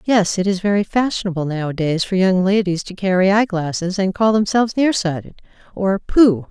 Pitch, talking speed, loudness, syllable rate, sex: 195 Hz, 205 wpm, -18 LUFS, 5.3 syllables/s, female